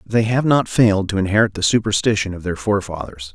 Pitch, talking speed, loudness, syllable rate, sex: 105 Hz, 195 wpm, -18 LUFS, 6.2 syllables/s, male